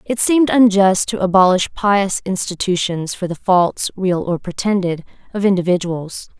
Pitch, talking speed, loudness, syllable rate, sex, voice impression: 190 Hz, 140 wpm, -16 LUFS, 4.6 syllables/s, female, feminine, adult-like, tensed, powerful, bright, clear, slightly fluent, slightly raspy, intellectual, calm, friendly, slightly lively, slightly sharp